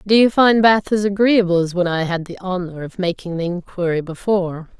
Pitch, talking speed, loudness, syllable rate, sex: 185 Hz, 215 wpm, -18 LUFS, 5.5 syllables/s, female